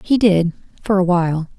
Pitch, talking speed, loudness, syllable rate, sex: 185 Hz, 150 wpm, -17 LUFS, 5.3 syllables/s, female